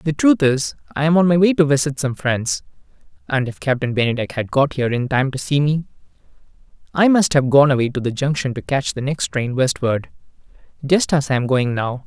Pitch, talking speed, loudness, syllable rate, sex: 140 Hz, 220 wpm, -18 LUFS, 5.6 syllables/s, male